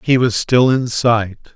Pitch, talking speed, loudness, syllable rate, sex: 115 Hz, 195 wpm, -15 LUFS, 3.9 syllables/s, male